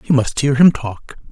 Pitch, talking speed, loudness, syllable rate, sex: 135 Hz, 230 wpm, -14 LUFS, 4.6 syllables/s, male